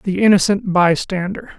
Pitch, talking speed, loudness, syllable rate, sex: 190 Hz, 115 wpm, -16 LUFS, 4.7 syllables/s, male